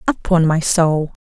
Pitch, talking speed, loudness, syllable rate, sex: 165 Hz, 145 wpm, -16 LUFS, 3.9 syllables/s, female